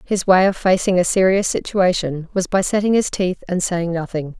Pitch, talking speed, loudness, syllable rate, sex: 185 Hz, 205 wpm, -18 LUFS, 5.0 syllables/s, female